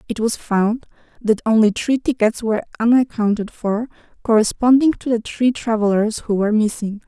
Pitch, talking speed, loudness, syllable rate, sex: 225 Hz, 155 wpm, -18 LUFS, 5.3 syllables/s, female